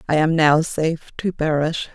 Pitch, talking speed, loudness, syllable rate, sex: 155 Hz, 185 wpm, -20 LUFS, 5.1 syllables/s, female